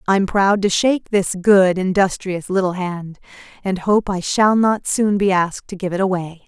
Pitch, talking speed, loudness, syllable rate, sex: 190 Hz, 195 wpm, -18 LUFS, 4.7 syllables/s, female